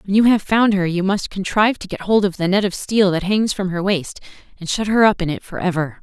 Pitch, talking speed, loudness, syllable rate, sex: 195 Hz, 290 wpm, -18 LUFS, 5.9 syllables/s, female